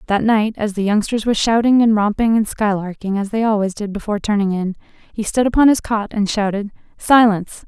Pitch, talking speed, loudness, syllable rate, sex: 210 Hz, 205 wpm, -17 LUFS, 5.9 syllables/s, female